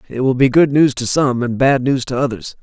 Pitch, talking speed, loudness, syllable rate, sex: 130 Hz, 275 wpm, -15 LUFS, 5.4 syllables/s, male